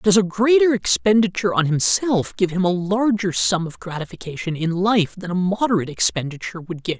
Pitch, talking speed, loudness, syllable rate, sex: 185 Hz, 180 wpm, -20 LUFS, 5.6 syllables/s, male